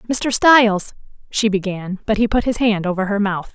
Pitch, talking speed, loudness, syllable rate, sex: 210 Hz, 205 wpm, -17 LUFS, 5.2 syllables/s, female